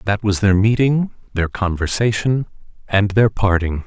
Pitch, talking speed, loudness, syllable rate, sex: 105 Hz, 140 wpm, -18 LUFS, 4.5 syllables/s, male